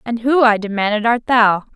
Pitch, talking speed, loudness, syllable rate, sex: 225 Hz, 205 wpm, -15 LUFS, 5.1 syllables/s, female